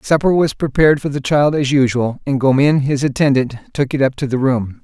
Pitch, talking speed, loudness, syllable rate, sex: 135 Hz, 225 wpm, -16 LUFS, 5.3 syllables/s, male